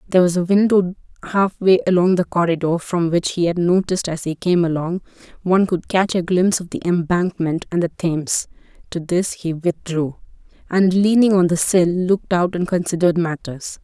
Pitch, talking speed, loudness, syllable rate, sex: 175 Hz, 180 wpm, -18 LUFS, 5.3 syllables/s, female